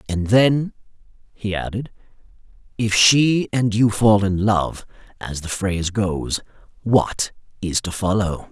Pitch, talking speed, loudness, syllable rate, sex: 105 Hz, 135 wpm, -19 LUFS, 3.8 syllables/s, male